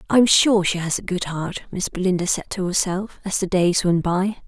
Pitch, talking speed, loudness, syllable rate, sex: 185 Hz, 240 wpm, -20 LUFS, 5.2 syllables/s, female